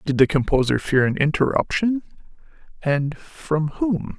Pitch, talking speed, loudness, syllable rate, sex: 160 Hz, 115 wpm, -21 LUFS, 4.2 syllables/s, male